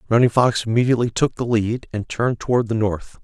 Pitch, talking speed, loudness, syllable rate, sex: 115 Hz, 205 wpm, -20 LUFS, 6.1 syllables/s, male